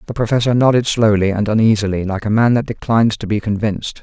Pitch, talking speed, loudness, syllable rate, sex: 110 Hz, 210 wpm, -16 LUFS, 6.5 syllables/s, male